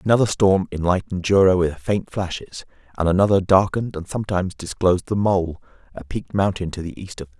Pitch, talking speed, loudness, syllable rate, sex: 95 Hz, 195 wpm, -21 LUFS, 6.4 syllables/s, male